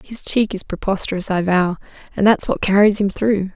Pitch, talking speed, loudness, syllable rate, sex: 195 Hz, 185 wpm, -18 LUFS, 5.3 syllables/s, female